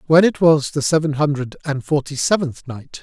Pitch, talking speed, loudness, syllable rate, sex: 150 Hz, 200 wpm, -18 LUFS, 5.0 syllables/s, male